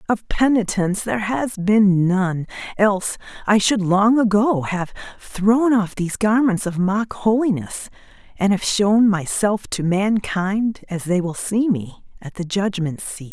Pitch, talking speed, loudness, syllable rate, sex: 200 Hz, 155 wpm, -19 LUFS, 4.1 syllables/s, female